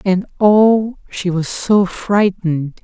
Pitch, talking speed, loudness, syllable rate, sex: 190 Hz, 125 wpm, -15 LUFS, 3.2 syllables/s, male